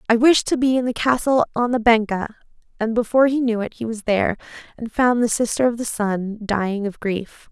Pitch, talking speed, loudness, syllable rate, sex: 230 Hz, 225 wpm, -20 LUFS, 5.6 syllables/s, female